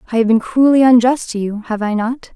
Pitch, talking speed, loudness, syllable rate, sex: 235 Hz, 255 wpm, -14 LUFS, 5.7 syllables/s, female